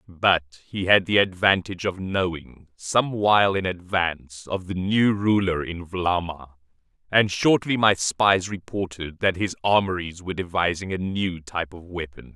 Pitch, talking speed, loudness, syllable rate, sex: 90 Hz, 155 wpm, -23 LUFS, 4.5 syllables/s, male